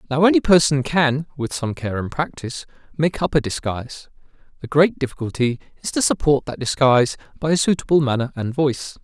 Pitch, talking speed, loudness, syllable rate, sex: 140 Hz, 180 wpm, -20 LUFS, 5.8 syllables/s, male